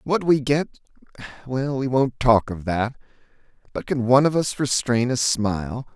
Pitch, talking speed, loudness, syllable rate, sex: 125 Hz, 160 wpm, -21 LUFS, 4.7 syllables/s, male